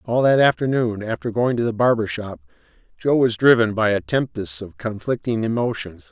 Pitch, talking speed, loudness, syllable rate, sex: 115 Hz, 175 wpm, -20 LUFS, 5.2 syllables/s, male